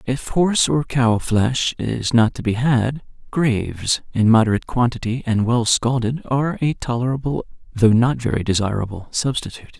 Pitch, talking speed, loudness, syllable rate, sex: 120 Hz, 155 wpm, -19 LUFS, 4.9 syllables/s, male